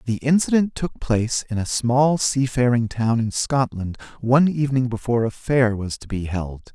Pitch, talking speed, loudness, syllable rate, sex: 125 Hz, 180 wpm, -21 LUFS, 5.0 syllables/s, male